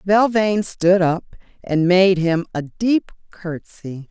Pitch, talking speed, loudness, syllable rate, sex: 180 Hz, 130 wpm, -18 LUFS, 3.6 syllables/s, female